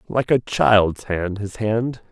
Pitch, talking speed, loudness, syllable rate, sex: 105 Hz, 170 wpm, -20 LUFS, 3.2 syllables/s, male